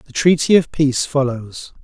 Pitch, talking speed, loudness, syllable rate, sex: 140 Hz, 165 wpm, -16 LUFS, 5.0 syllables/s, male